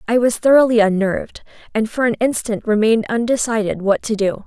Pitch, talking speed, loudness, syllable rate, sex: 225 Hz, 175 wpm, -17 LUFS, 5.8 syllables/s, female